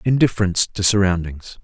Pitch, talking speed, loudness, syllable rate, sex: 100 Hz, 110 wpm, -18 LUFS, 6.0 syllables/s, male